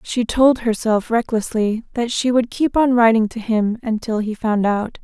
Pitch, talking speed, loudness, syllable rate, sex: 230 Hz, 190 wpm, -18 LUFS, 4.4 syllables/s, female